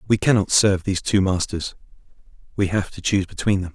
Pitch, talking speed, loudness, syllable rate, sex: 95 Hz, 190 wpm, -21 LUFS, 6.5 syllables/s, male